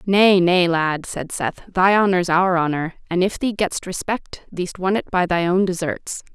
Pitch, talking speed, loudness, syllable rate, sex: 185 Hz, 200 wpm, -19 LUFS, 4.4 syllables/s, female